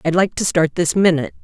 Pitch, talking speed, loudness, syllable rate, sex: 170 Hz, 250 wpm, -17 LUFS, 6.4 syllables/s, female